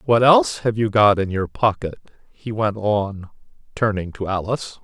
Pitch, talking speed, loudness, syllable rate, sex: 110 Hz, 175 wpm, -19 LUFS, 4.9 syllables/s, male